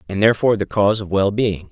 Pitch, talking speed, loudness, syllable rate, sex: 100 Hz, 210 wpm, -18 LUFS, 7.2 syllables/s, male